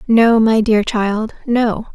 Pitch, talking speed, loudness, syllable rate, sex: 220 Hz, 155 wpm, -15 LUFS, 3.1 syllables/s, female